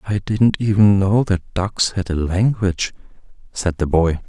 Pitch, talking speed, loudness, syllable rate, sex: 95 Hz, 170 wpm, -18 LUFS, 4.4 syllables/s, male